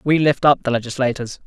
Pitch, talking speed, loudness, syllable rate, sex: 130 Hz, 205 wpm, -18 LUFS, 6.0 syllables/s, male